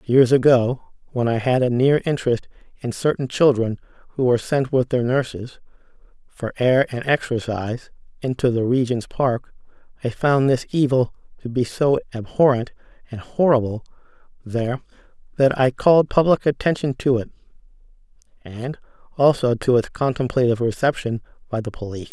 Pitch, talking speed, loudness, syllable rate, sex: 125 Hz, 140 wpm, -20 LUFS, 5.2 syllables/s, male